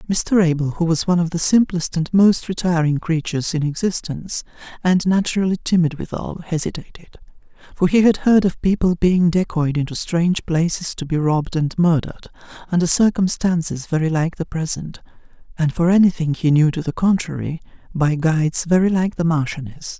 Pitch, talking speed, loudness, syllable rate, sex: 170 Hz, 165 wpm, -19 LUFS, 5.5 syllables/s, male